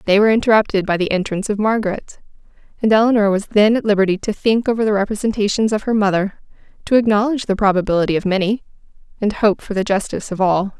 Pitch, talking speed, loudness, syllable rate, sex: 205 Hz, 195 wpm, -17 LUFS, 7.0 syllables/s, female